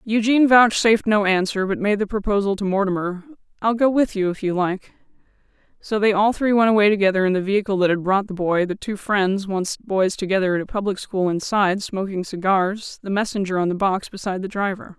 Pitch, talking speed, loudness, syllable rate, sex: 200 Hz, 210 wpm, -20 LUFS, 5.3 syllables/s, female